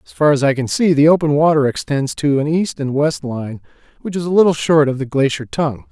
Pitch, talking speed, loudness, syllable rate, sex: 145 Hz, 255 wpm, -16 LUFS, 5.8 syllables/s, male